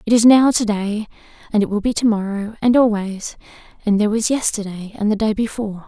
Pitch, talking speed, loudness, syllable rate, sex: 215 Hz, 195 wpm, -18 LUFS, 5.9 syllables/s, female